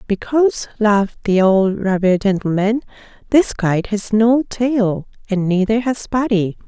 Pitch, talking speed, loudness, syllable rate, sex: 215 Hz, 135 wpm, -17 LUFS, 4.2 syllables/s, female